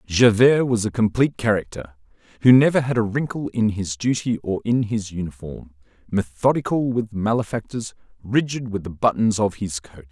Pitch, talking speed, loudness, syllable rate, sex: 110 Hz, 160 wpm, -21 LUFS, 5.1 syllables/s, male